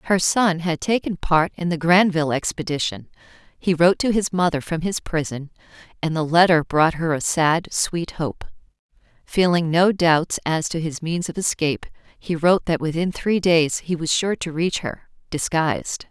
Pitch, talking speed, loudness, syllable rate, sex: 165 Hz, 180 wpm, -21 LUFS, 4.8 syllables/s, female